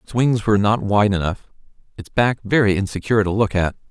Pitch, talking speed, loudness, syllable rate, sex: 105 Hz, 200 wpm, -19 LUFS, 6.0 syllables/s, male